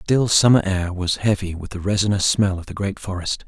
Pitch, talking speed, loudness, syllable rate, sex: 95 Hz, 240 wpm, -20 LUFS, 5.5 syllables/s, male